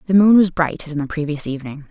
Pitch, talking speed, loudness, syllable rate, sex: 160 Hz, 285 wpm, -18 LUFS, 7.0 syllables/s, female